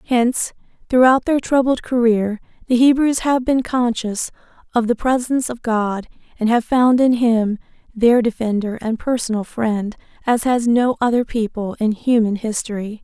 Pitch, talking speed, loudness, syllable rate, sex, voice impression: 235 Hz, 150 wpm, -18 LUFS, 4.6 syllables/s, female, very feminine, slightly young, slightly adult-like, very thin, relaxed, slightly weak, slightly bright, very soft, clear, fluent, slightly raspy, very cute, intellectual, very refreshing, very sincere, very calm, very friendly, very reassuring, very unique, very elegant, very sweet, lively, very kind, modest